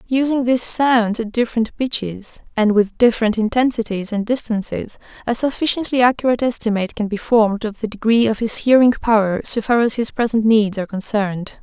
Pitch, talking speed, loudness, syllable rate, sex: 225 Hz, 175 wpm, -18 LUFS, 5.7 syllables/s, female